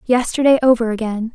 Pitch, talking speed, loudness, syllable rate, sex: 240 Hz, 135 wpm, -16 LUFS, 5.9 syllables/s, female